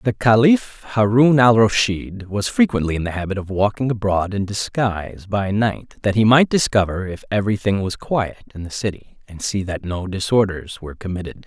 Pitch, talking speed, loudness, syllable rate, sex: 105 Hz, 190 wpm, -19 LUFS, 5.2 syllables/s, male